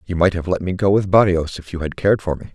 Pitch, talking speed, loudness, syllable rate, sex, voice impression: 90 Hz, 330 wpm, -18 LUFS, 6.8 syllables/s, male, masculine, middle-aged, slightly weak, hard, fluent, raspy, calm, mature, slightly reassuring, slightly wild, slightly kind, slightly strict, slightly modest